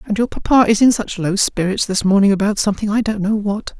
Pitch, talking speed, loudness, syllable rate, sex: 205 Hz, 235 wpm, -16 LUFS, 6.0 syllables/s, female